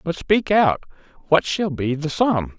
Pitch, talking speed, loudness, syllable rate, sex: 165 Hz, 160 wpm, -20 LUFS, 4.1 syllables/s, male